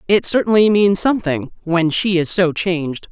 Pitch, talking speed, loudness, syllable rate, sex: 180 Hz, 175 wpm, -16 LUFS, 5.0 syllables/s, female